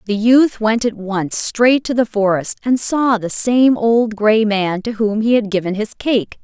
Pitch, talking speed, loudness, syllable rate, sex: 220 Hz, 215 wpm, -16 LUFS, 4.0 syllables/s, female